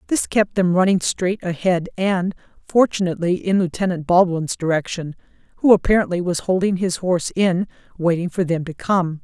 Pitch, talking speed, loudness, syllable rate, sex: 180 Hz, 155 wpm, -19 LUFS, 5.2 syllables/s, female